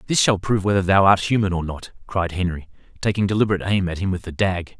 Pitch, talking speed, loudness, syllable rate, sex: 95 Hz, 240 wpm, -20 LUFS, 6.8 syllables/s, male